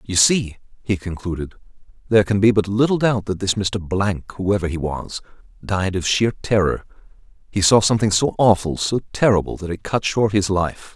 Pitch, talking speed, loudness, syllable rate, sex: 100 Hz, 185 wpm, -19 LUFS, 5.2 syllables/s, male